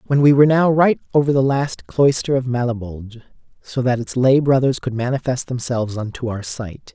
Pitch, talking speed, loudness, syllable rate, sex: 130 Hz, 190 wpm, -18 LUFS, 5.5 syllables/s, male